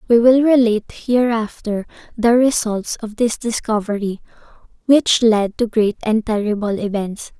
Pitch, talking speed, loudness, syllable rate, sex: 225 Hz, 130 wpm, -17 LUFS, 4.4 syllables/s, female